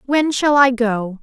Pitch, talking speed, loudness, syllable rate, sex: 255 Hz, 195 wpm, -16 LUFS, 3.7 syllables/s, female